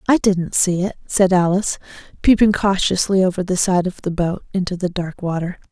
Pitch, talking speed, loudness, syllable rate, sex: 185 Hz, 190 wpm, -18 LUFS, 5.4 syllables/s, female